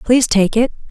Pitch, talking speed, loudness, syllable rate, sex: 230 Hz, 200 wpm, -14 LUFS, 6.2 syllables/s, female